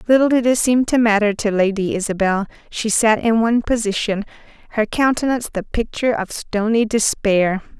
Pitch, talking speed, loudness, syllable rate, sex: 220 Hz, 160 wpm, -18 LUFS, 5.4 syllables/s, female